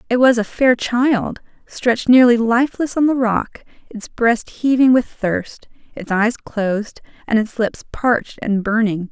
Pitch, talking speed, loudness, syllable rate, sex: 235 Hz, 165 wpm, -17 LUFS, 4.2 syllables/s, female